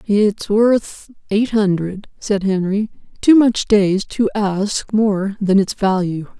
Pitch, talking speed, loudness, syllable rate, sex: 205 Hz, 140 wpm, -17 LUFS, 3.3 syllables/s, female